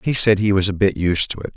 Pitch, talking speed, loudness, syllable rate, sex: 100 Hz, 345 wpm, -18 LUFS, 6.6 syllables/s, male